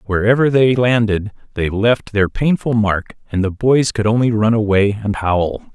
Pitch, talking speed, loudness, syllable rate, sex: 110 Hz, 180 wpm, -16 LUFS, 4.4 syllables/s, male